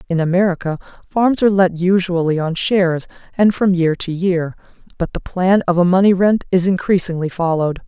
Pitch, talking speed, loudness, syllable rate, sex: 180 Hz, 175 wpm, -16 LUFS, 5.5 syllables/s, female